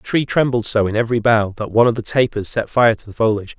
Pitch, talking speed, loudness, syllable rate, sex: 115 Hz, 285 wpm, -17 LUFS, 6.8 syllables/s, male